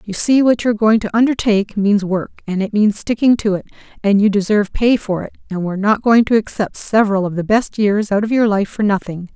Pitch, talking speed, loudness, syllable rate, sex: 210 Hz, 250 wpm, -16 LUFS, 6.0 syllables/s, female